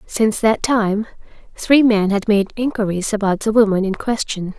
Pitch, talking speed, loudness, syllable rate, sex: 210 Hz, 170 wpm, -17 LUFS, 4.8 syllables/s, female